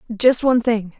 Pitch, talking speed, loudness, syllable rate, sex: 230 Hz, 180 wpm, -17 LUFS, 5.1 syllables/s, female